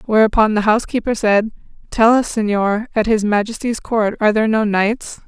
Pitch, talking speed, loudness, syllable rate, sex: 215 Hz, 170 wpm, -16 LUFS, 5.4 syllables/s, female